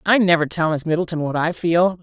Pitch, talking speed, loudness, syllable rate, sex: 170 Hz, 235 wpm, -19 LUFS, 5.8 syllables/s, female